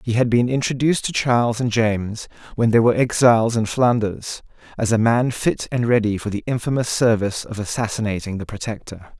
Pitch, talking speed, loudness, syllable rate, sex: 115 Hz, 185 wpm, -20 LUFS, 5.7 syllables/s, male